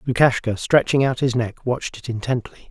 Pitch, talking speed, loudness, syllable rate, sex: 125 Hz, 175 wpm, -21 LUFS, 5.7 syllables/s, male